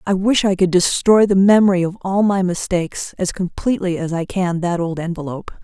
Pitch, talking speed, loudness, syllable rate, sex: 185 Hz, 200 wpm, -17 LUFS, 5.5 syllables/s, female